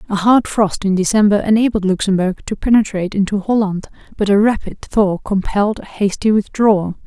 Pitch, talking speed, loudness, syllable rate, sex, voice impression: 205 Hz, 160 wpm, -16 LUFS, 5.5 syllables/s, female, gender-neutral, slightly young, slightly clear, fluent, refreshing, calm, friendly, kind